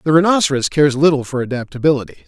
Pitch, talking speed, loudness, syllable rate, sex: 145 Hz, 160 wpm, -16 LUFS, 7.8 syllables/s, male